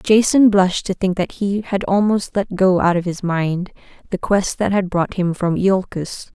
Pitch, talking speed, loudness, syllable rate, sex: 190 Hz, 205 wpm, -18 LUFS, 4.6 syllables/s, female